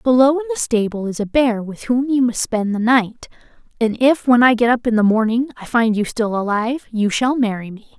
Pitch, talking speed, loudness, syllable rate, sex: 235 Hz, 240 wpm, -17 LUFS, 5.4 syllables/s, female